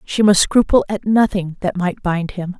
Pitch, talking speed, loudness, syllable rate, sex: 190 Hz, 210 wpm, -17 LUFS, 4.7 syllables/s, female